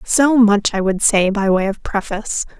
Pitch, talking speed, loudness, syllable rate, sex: 210 Hz, 210 wpm, -16 LUFS, 4.6 syllables/s, female